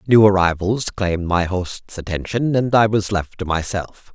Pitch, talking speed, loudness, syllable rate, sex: 100 Hz, 175 wpm, -19 LUFS, 4.6 syllables/s, male